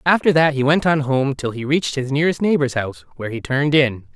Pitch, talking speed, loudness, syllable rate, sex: 140 Hz, 245 wpm, -18 LUFS, 6.4 syllables/s, male